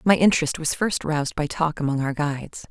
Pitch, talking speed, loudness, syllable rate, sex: 155 Hz, 220 wpm, -23 LUFS, 5.9 syllables/s, female